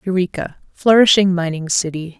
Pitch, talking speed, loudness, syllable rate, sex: 180 Hz, 80 wpm, -16 LUFS, 5.2 syllables/s, female